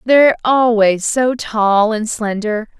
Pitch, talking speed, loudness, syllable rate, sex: 225 Hz, 130 wpm, -15 LUFS, 3.6 syllables/s, female